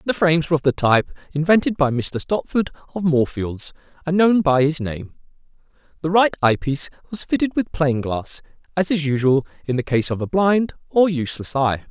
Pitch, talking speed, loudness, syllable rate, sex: 155 Hz, 190 wpm, -20 LUFS, 5.4 syllables/s, male